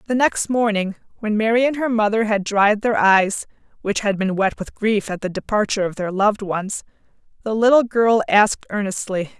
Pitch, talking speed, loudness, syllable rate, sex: 210 Hz, 190 wpm, -19 LUFS, 5.2 syllables/s, female